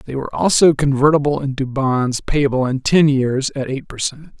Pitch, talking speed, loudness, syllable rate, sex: 140 Hz, 205 wpm, -17 LUFS, 5.7 syllables/s, male